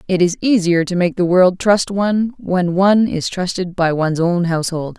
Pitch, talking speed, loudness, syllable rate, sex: 180 Hz, 205 wpm, -16 LUFS, 5.0 syllables/s, female